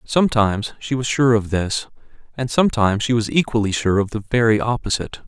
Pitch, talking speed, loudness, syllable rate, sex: 110 Hz, 180 wpm, -19 LUFS, 5.9 syllables/s, male